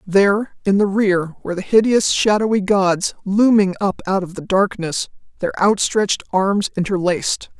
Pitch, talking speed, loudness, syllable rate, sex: 195 Hz, 150 wpm, -18 LUFS, 4.7 syllables/s, female